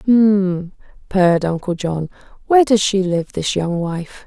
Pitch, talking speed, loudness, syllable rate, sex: 190 Hz, 170 wpm, -17 LUFS, 4.4 syllables/s, female